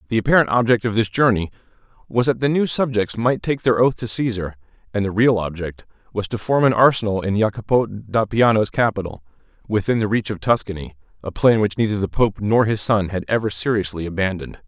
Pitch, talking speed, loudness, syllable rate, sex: 110 Hz, 190 wpm, -19 LUFS, 5.8 syllables/s, male